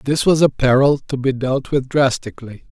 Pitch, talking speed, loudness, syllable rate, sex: 135 Hz, 195 wpm, -17 LUFS, 5.1 syllables/s, male